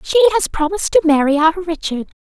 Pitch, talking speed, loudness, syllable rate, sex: 340 Hz, 190 wpm, -15 LUFS, 6.6 syllables/s, female